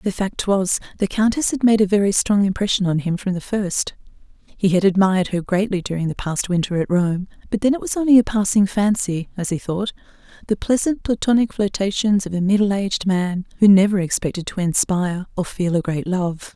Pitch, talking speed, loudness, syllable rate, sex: 195 Hz, 205 wpm, -19 LUFS, 5.5 syllables/s, female